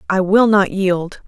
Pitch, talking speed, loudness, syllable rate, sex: 195 Hz, 190 wpm, -15 LUFS, 3.7 syllables/s, female